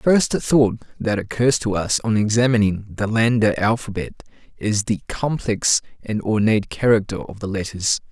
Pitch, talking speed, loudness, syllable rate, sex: 110 Hz, 155 wpm, -20 LUFS, 4.8 syllables/s, male